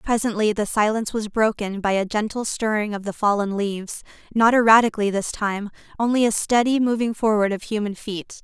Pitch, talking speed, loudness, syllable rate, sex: 215 Hz, 180 wpm, -21 LUFS, 5.6 syllables/s, female